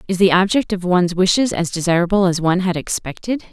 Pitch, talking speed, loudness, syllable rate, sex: 185 Hz, 205 wpm, -17 LUFS, 6.4 syllables/s, female